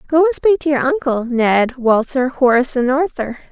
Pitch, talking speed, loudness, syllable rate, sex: 270 Hz, 190 wpm, -16 LUFS, 5.0 syllables/s, female